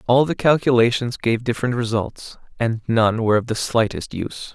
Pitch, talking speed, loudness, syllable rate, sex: 115 Hz, 170 wpm, -20 LUFS, 5.3 syllables/s, male